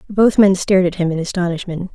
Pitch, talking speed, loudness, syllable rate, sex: 185 Hz, 215 wpm, -16 LUFS, 6.3 syllables/s, female